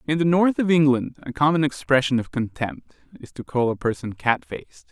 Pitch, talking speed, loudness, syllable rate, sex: 135 Hz, 205 wpm, -22 LUFS, 5.7 syllables/s, male